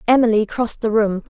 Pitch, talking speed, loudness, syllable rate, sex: 220 Hz, 180 wpm, -18 LUFS, 6.3 syllables/s, female